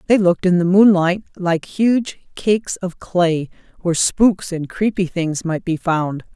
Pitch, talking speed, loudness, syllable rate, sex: 180 Hz, 170 wpm, -18 LUFS, 4.1 syllables/s, female